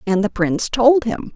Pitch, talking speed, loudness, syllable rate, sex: 225 Hz, 220 wpm, -17 LUFS, 4.9 syllables/s, female